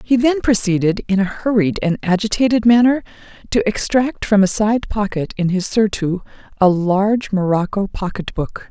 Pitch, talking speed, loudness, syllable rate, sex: 205 Hz, 160 wpm, -17 LUFS, 4.8 syllables/s, female